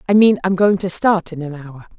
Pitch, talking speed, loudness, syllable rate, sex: 180 Hz, 270 wpm, -16 LUFS, 5.5 syllables/s, female